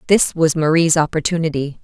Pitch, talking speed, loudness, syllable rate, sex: 160 Hz, 130 wpm, -16 LUFS, 5.5 syllables/s, female